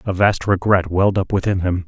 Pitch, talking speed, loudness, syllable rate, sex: 95 Hz, 225 wpm, -18 LUFS, 5.7 syllables/s, male